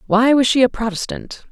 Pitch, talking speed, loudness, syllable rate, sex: 240 Hz, 200 wpm, -16 LUFS, 5.4 syllables/s, female